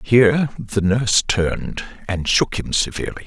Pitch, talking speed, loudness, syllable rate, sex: 110 Hz, 145 wpm, -19 LUFS, 4.7 syllables/s, male